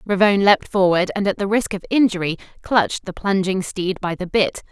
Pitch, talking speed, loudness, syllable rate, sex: 195 Hz, 205 wpm, -19 LUFS, 5.9 syllables/s, female